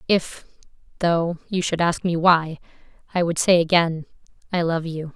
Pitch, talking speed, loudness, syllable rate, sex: 170 Hz, 165 wpm, -21 LUFS, 4.6 syllables/s, female